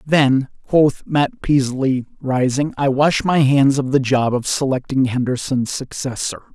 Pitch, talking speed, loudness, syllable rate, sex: 135 Hz, 145 wpm, -18 LUFS, 4.0 syllables/s, male